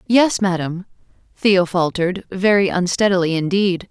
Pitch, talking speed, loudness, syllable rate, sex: 190 Hz, 105 wpm, -18 LUFS, 5.0 syllables/s, female